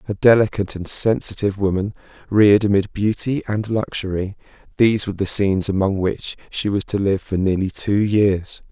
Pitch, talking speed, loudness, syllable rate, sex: 100 Hz, 165 wpm, -19 LUFS, 5.5 syllables/s, male